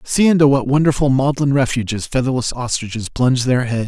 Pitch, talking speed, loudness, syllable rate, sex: 130 Hz, 170 wpm, -17 LUFS, 5.8 syllables/s, male